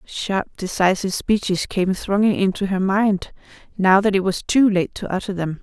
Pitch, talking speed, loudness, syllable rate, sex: 195 Hz, 180 wpm, -20 LUFS, 4.7 syllables/s, female